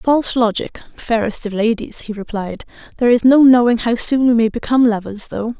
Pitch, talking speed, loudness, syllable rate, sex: 230 Hz, 195 wpm, -16 LUFS, 5.5 syllables/s, female